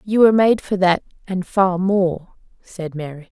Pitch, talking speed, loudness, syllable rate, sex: 185 Hz, 175 wpm, -18 LUFS, 4.5 syllables/s, female